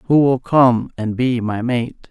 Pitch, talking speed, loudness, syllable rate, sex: 125 Hz, 200 wpm, -17 LUFS, 3.5 syllables/s, male